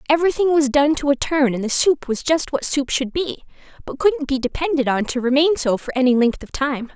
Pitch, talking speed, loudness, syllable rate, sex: 280 Hz, 240 wpm, -19 LUFS, 5.6 syllables/s, female